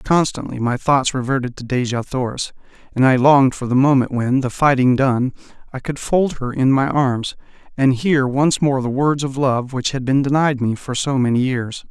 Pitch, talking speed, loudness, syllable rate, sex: 130 Hz, 205 wpm, -18 LUFS, 4.9 syllables/s, male